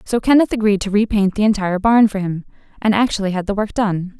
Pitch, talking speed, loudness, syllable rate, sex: 205 Hz, 230 wpm, -17 LUFS, 6.2 syllables/s, female